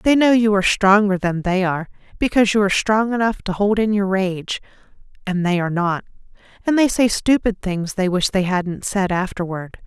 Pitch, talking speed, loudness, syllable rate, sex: 200 Hz, 200 wpm, -19 LUFS, 5.3 syllables/s, female